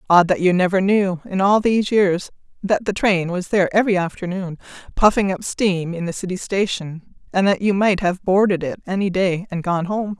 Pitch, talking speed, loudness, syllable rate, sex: 190 Hz, 205 wpm, -19 LUFS, 5.3 syllables/s, female